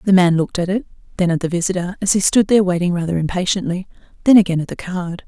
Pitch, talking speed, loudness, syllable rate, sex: 185 Hz, 240 wpm, -17 LUFS, 7.0 syllables/s, female